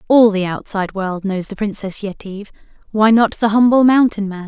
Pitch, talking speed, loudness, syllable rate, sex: 205 Hz, 175 wpm, -16 LUFS, 5.3 syllables/s, female